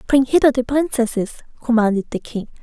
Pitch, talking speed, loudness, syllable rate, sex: 245 Hz, 160 wpm, -18 LUFS, 5.9 syllables/s, female